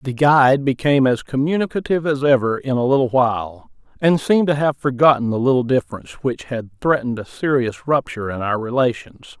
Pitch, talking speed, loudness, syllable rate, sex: 130 Hz, 180 wpm, -18 LUFS, 6.0 syllables/s, male